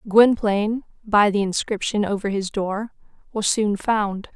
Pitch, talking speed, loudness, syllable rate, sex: 210 Hz, 140 wpm, -21 LUFS, 4.2 syllables/s, female